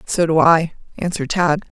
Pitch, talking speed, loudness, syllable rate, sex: 165 Hz, 165 wpm, -17 LUFS, 5.5 syllables/s, female